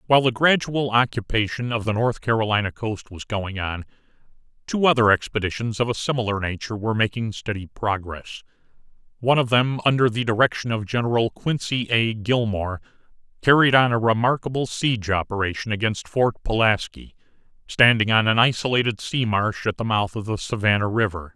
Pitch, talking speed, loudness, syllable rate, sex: 110 Hz, 155 wpm, -21 LUFS, 5.6 syllables/s, male